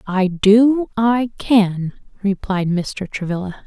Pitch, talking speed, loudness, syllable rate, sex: 205 Hz, 115 wpm, -18 LUFS, 3.1 syllables/s, female